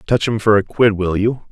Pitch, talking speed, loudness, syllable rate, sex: 105 Hz, 280 wpm, -16 LUFS, 5.3 syllables/s, male